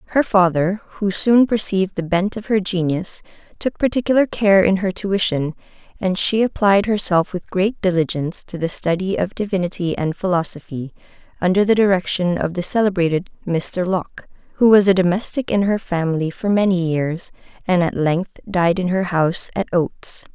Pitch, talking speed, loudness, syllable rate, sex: 185 Hz, 170 wpm, -19 LUFS, 5.2 syllables/s, female